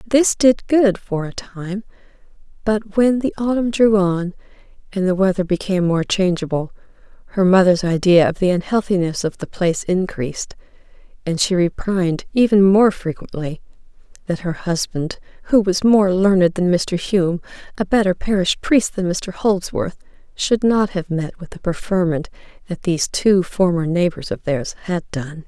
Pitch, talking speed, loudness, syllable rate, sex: 185 Hz, 160 wpm, -18 LUFS, 4.7 syllables/s, female